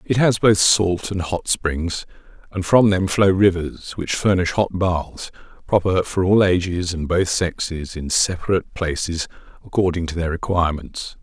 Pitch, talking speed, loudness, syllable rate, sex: 90 Hz, 160 wpm, -20 LUFS, 4.4 syllables/s, male